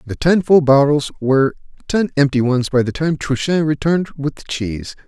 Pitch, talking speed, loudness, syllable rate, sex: 145 Hz, 190 wpm, -17 LUFS, 5.4 syllables/s, male